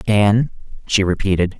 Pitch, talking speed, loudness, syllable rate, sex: 100 Hz, 115 wpm, -18 LUFS, 4.5 syllables/s, male